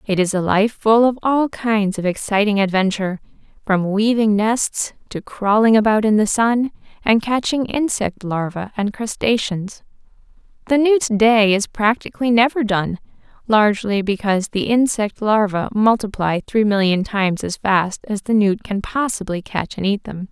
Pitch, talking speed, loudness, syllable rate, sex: 210 Hz, 155 wpm, -18 LUFS, 4.5 syllables/s, female